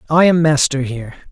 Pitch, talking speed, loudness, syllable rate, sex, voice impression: 145 Hz, 185 wpm, -15 LUFS, 6.3 syllables/s, male, masculine, adult-like, refreshing, slightly sincere, friendly